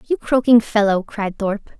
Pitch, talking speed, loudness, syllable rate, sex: 220 Hz, 165 wpm, -18 LUFS, 5.5 syllables/s, female